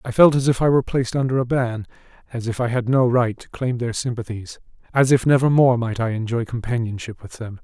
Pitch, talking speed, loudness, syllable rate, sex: 120 Hz, 220 wpm, -20 LUFS, 5.9 syllables/s, male